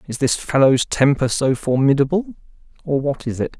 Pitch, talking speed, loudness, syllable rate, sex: 140 Hz, 165 wpm, -18 LUFS, 5.2 syllables/s, male